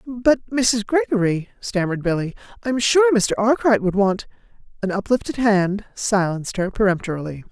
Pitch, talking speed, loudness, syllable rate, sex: 215 Hz, 145 wpm, -20 LUFS, 5.1 syllables/s, female